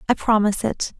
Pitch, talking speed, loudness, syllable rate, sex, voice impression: 215 Hz, 180 wpm, -20 LUFS, 6.5 syllables/s, female, feminine, slightly young, bright, slightly soft, clear, fluent, slightly cute, friendly, unique, elegant, kind, light